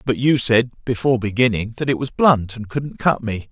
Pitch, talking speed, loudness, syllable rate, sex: 120 Hz, 220 wpm, -19 LUFS, 5.0 syllables/s, male